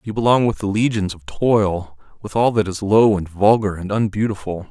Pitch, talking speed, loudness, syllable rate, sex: 100 Hz, 205 wpm, -18 LUFS, 5.0 syllables/s, male